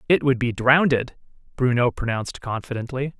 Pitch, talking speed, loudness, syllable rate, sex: 130 Hz, 130 wpm, -22 LUFS, 5.4 syllables/s, male